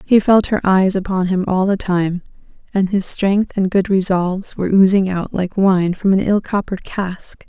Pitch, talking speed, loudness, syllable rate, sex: 190 Hz, 200 wpm, -16 LUFS, 4.7 syllables/s, female